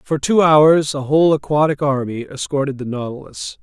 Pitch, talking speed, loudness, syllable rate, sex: 145 Hz, 165 wpm, -16 LUFS, 5.1 syllables/s, male